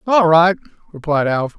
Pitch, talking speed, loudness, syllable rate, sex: 165 Hz, 150 wpm, -15 LUFS, 4.7 syllables/s, male